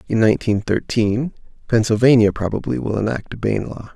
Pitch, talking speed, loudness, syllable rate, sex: 110 Hz, 150 wpm, -19 LUFS, 5.8 syllables/s, male